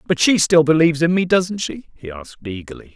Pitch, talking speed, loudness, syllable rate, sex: 155 Hz, 225 wpm, -16 LUFS, 5.8 syllables/s, male